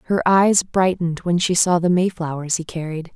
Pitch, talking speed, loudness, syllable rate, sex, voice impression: 175 Hz, 190 wpm, -19 LUFS, 5.1 syllables/s, female, very feminine, slightly adult-like, calm, elegant